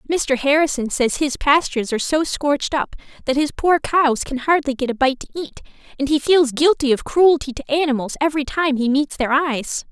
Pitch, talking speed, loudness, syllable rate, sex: 280 Hz, 205 wpm, -18 LUFS, 5.4 syllables/s, female